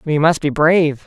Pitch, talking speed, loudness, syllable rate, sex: 155 Hz, 225 wpm, -15 LUFS, 5.3 syllables/s, male